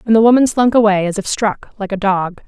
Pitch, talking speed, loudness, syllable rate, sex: 210 Hz, 265 wpm, -14 LUFS, 5.9 syllables/s, female